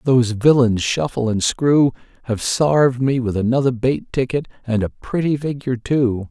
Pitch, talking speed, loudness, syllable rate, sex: 125 Hz, 160 wpm, -18 LUFS, 4.9 syllables/s, male